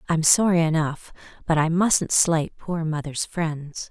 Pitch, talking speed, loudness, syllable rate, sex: 160 Hz, 155 wpm, -22 LUFS, 3.9 syllables/s, female